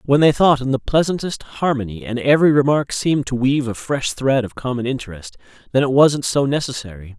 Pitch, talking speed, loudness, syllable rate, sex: 130 Hz, 200 wpm, -18 LUFS, 5.8 syllables/s, male